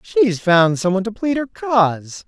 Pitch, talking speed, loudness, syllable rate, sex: 190 Hz, 210 wpm, -17 LUFS, 4.6 syllables/s, male